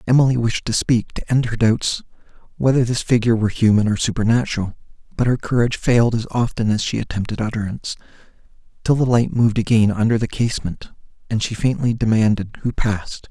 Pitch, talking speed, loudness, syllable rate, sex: 115 Hz, 175 wpm, -19 LUFS, 6.3 syllables/s, male